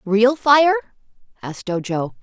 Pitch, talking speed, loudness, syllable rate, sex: 230 Hz, 110 wpm, -17 LUFS, 3.8 syllables/s, female